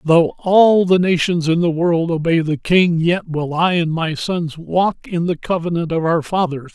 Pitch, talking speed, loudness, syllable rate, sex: 170 Hz, 205 wpm, -17 LUFS, 4.3 syllables/s, male